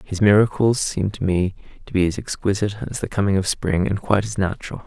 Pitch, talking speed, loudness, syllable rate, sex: 100 Hz, 220 wpm, -21 LUFS, 6.1 syllables/s, male